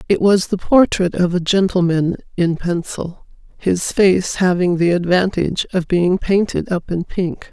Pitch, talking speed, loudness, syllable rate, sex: 180 Hz, 160 wpm, -17 LUFS, 4.3 syllables/s, female